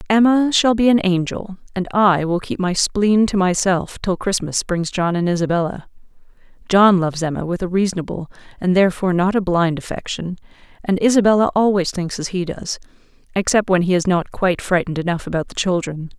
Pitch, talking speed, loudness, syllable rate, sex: 185 Hz, 180 wpm, -18 LUFS, 5.7 syllables/s, female